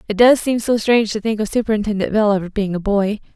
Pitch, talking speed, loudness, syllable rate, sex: 210 Hz, 250 wpm, -17 LUFS, 6.6 syllables/s, female